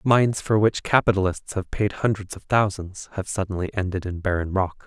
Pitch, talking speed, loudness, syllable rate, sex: 100 Hz, 185 wpm, -23 LUFS, 5.4 syllables/s, male